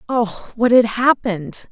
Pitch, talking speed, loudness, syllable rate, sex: 225 Hz, 140 wpm, -17 LUFS, 3.9 syllables/s, female